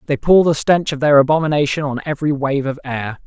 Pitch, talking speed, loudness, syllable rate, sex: 145 Hz, 220 wpm, -16 LUFS, 6.1 syllables/s, male